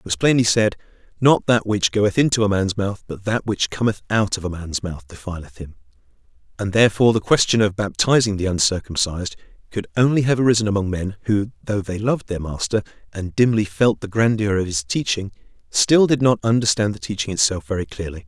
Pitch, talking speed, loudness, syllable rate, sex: 105 Hz, 195 wpm, -20 LUFS, 5.8 syllables/s, male